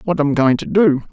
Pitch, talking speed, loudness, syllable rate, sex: 155 Hz, 270 wpm, -15 LUFS, 5.2 syllables/s, male